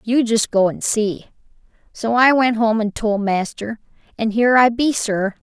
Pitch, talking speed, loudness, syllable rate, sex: 225 Hz, 185 wpm, -17 LUFS, 4.5 syllables/s, female